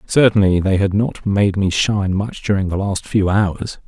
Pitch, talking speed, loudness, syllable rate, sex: 100 Hz, 200 wpm, -17 LUFS, 4.6 syllables/s, male